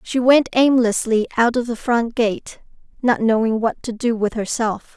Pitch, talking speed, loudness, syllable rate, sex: 230 Hz, 180 wpm, -18 LUFS, 4.4 syllables/s, female